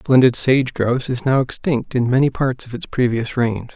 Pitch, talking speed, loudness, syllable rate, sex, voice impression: 125 Hz, 225 wpm, -18 LUFS, 5.4 syllables/s, male, masculine, adult-like, slightly thick, tensed, slightly dark, soft, clear, fluent, intellectual, calm, reassuring, wild, modest